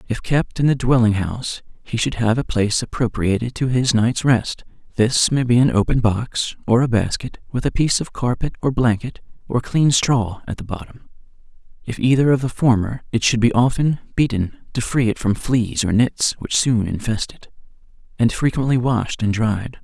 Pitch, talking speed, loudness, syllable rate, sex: 120 Hz, 195 wpm, -19 LUFS, 5.0 syllables/s, male